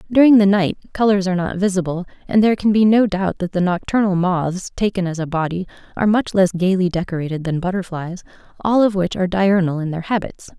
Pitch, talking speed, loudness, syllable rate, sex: 190 Hz, 205 wpm, -18 LUFS, 6.1 syllables/s, female